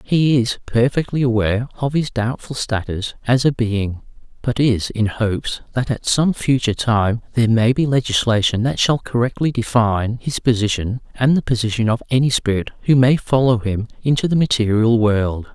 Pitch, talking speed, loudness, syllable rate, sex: 120 Hz, 170 wpm, -18 LUFS, 5.1 syllables/s, male